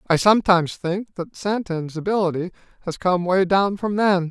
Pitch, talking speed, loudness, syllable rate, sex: 185 Hz, 165 wpm, -21 LUFS, 5.1 syllables/s, male